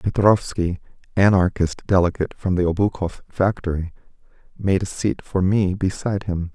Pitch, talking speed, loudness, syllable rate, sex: 95 Hz, 130 wpm, -21 LUFS, 5.1 syllables/s, male